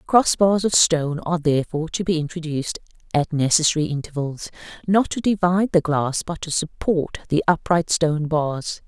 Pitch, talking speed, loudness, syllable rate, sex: 165 Hz, 160 wpm, -21 LUFS, 5.3 syllables/s, female